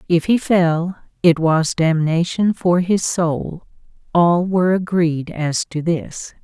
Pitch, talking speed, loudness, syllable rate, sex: 170 Hz, 130 wpm, -18 LUFS, 3.5 syllables/s, female